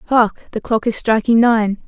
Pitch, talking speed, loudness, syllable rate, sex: 225 Hz, 190 wpm, -16 LUFS, 4.8 syllables/s, female